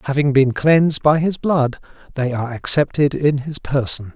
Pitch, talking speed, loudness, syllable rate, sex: 140 Hz, 175 wpm, -18 LUFS, 5.0 syllables/s, male